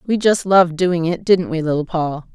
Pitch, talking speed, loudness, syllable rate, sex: 170 Hz, 230 wpm, -17 LUFS, 5.2 syllables/s, female